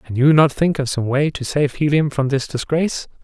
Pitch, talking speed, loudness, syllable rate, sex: 140 Hz, 240 wpm, -18 LUFS, 5.4 syllables/s, male